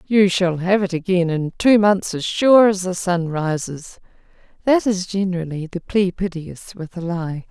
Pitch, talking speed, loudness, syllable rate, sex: 180 Hz, 185 wpm, -19 LUFS, 4.4 syllables/s, female